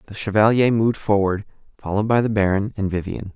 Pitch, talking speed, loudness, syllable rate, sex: 105 Hz, 180 wpm, -20 LUFS, 6.4 syllables/s, male